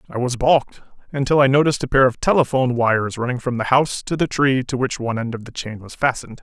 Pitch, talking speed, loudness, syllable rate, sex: 130 Hz, 250 wpm, -19 LUFS, 6.8 syllables/s, male